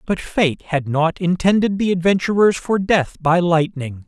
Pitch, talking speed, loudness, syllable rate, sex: 175 Hz, 160 wpm, -18 LUFS, 4.3 syllables/s, male